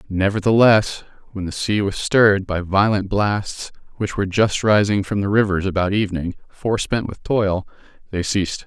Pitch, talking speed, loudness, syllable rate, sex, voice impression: 100 Hz, 160 wpm, -19 LUFS, 4.9 syllables/s, male, very masculine, slightly old, very thick, slightly relaxed, slightly powerful, slightly bright, soft, muffled, slightly halting, raspy, very cool, intellectual, slightly refreshing, sincere, very calm, very mature, very friendly, very reassuring, unique, elegant, very wild, sweet, slightly lively, kind, slightly modest